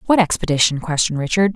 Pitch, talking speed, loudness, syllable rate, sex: 170 Hz, 155 wpm, -18 LUFS, 7.2 syllables/s, female